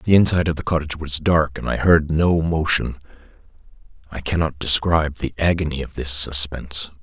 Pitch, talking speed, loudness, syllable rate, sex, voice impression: 75 Hz, 170 wpm, -20 LUFS, 5.6 syllables/s, male, masculine, middle-aged, thick, powerful, slightly dark, muffled, raspy, cool, intellectual, calm, mature, wild, slightly strict, slightly sharp